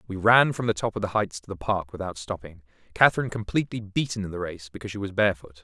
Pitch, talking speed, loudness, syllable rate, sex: 105 Hz, 235 wpm, -25 LUFS, 7.2 syllables/s, male